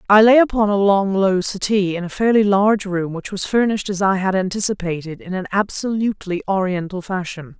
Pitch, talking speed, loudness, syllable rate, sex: 195 Hz, 190 wpm, -18 LUFS, 5.6 syllables/s, female